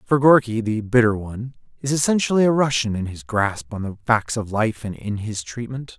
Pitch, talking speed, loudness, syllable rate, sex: 115 Hz, 210 wpm, -21 LUFS, 5.2 syllables/s, male